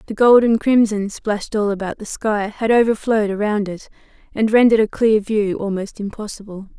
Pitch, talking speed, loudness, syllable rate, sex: 210 Hz, 175 wpm, -18 LUFS, 5.4 syllables/s, female